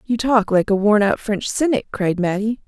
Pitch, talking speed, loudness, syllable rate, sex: 210 Hz, 225 wpm, -18 LUFS, 4.8 syllables/s, female